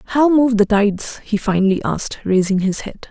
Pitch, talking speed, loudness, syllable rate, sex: 215 Hz, 195 wpm, -17 LUFS, 5.1 syllables/s, female